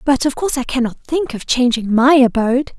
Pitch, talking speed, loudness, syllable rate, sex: 260 Hz, 215 wpm, -16 LUFS, 5.7 syllables/s, female